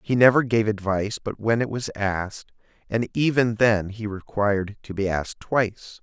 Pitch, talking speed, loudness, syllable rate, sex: 110 Hz, 180 wpm, -23 LUFS, 5.0 syllables/s, male